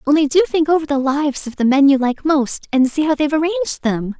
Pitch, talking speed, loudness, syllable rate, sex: 290 Hz, 255 wpm, -16 LUFS, 6.6 syllables/s, female